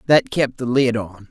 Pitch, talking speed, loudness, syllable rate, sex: 120 Hz, 230 wpm, -19 LUFS, 4.4 syllables/s, male